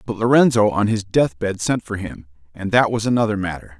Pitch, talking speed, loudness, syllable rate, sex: 105 Hz, 205 wpm, -19 LUFS, 5.6 syllables/s, male